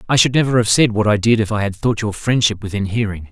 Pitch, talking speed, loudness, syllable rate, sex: 110 Hz, 290 wpm, -16 LUFS, 6.4 syllables/s, male